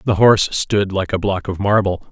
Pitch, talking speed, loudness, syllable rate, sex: 100 Hz, 225 wpm, -17 LUFS, 5.2 syllables/s, male